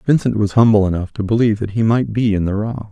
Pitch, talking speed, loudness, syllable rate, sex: 110 Hz, 265 wpm, -16 LUFS, 6.5 syllables/s, male